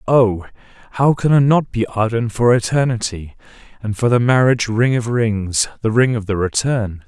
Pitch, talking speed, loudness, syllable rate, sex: 115 Hz, 170 wpm, -17 LUFS, 4.8 syllables/s, male